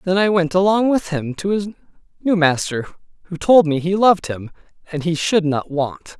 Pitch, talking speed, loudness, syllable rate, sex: 175 Hz, 205 wpm, -18 LUFS, 5.1 syllables/s, male